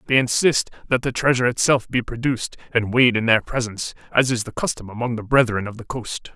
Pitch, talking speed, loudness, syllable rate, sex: 120 Hz, 215 wpm, -21 LUFS, 6.2 syllables/s, male